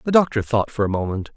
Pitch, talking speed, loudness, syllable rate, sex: 120 Hz, 265 wpm, -21 LUFS, 6.6 syllables/s, male